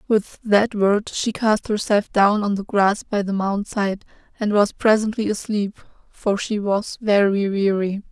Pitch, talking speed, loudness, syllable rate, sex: 205 Hz, 170 wpm, -20 LUFS, 4.0 syllables/s, female